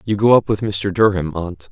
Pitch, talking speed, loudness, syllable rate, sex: 100 Hz, 245 wpm, -17 LUFS, 5.1 syllables/s, male